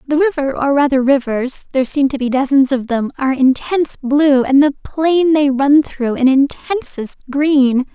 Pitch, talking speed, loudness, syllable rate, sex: 275 Hz, 165 wpm, -15 LUFS, 4.7 syllables/s, female